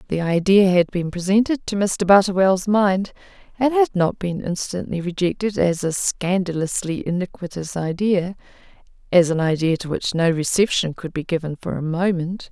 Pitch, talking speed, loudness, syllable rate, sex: 185 Hz, 160 wpm, -20 LUFS, 4.9 syllables/s, female